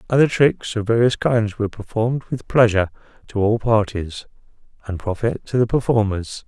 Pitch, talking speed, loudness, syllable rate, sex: 110 Hz, 160 wpm, -20 LUFS, 5.2 syllables/s, male